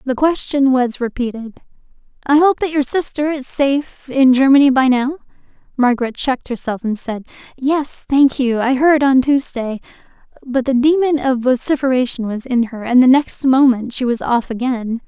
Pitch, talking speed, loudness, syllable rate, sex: 260 Hz, 170 wpm, -16 LUFS, 4.8 syllables/s, female